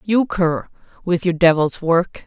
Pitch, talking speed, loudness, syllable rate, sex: 175 Hz, 160 wpm, -18 LUFS, 3.8 syllables/s, female